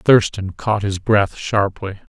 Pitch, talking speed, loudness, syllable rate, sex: 100 Hz, 140 wpm, -18 LUFS, 3.6 syllables/s, male